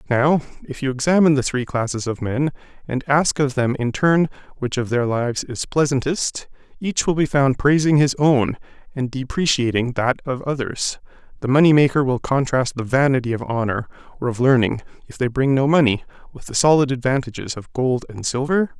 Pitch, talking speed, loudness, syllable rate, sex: 135 Hz, 185 wpm, -20 LUFS, 5.3 syllables/s, male